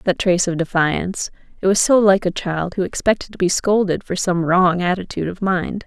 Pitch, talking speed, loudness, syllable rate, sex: 185 Hz, 205 wpm, -18 LUFS, 5.4 syllables/s, female